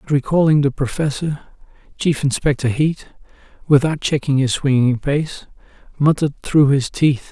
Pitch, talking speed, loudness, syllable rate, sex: 140 Hz, 130 wpm, -18 LUFS, 4.9 syllables/s, male